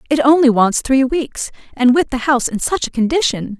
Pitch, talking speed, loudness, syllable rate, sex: 260 Hz, 200 wpm, -15 LUFS, 5.4 syllables/s, female